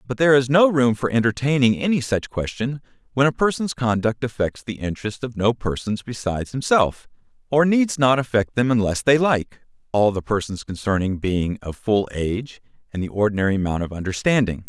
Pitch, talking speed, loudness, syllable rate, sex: 115 Hz, 180 wpm, -21 LUFS, 3.7 syllables/s, male